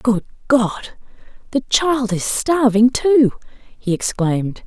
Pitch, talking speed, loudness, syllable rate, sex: 235 Hz, 115 wpm, -17 LUFS, 3.4 syllables/s, female